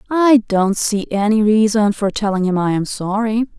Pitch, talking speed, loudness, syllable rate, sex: 210 Hz, 185 wpm, -16 LUFS, 4.6 syllables/s, female